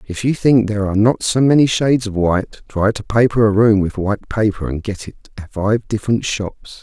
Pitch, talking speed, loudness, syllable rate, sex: 105 Hz, 230 wpm, -16 LUFS, 5.5 syllables/s, male